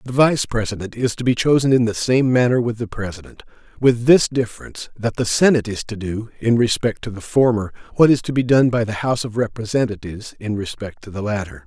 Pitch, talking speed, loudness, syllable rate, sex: 115 Hz, 220 wpm, -19 LUFS, 6.0 syllables/s, male